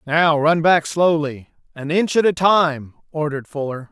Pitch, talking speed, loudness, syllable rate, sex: 155 Hz, 155 wpm, -18 LUFS, 4.4 syllables/s, male